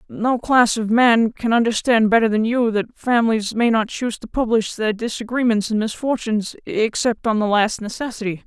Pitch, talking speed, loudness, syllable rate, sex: 225 Hz, 175 wpm, -19 LUFS, 5.1 syllables/s, female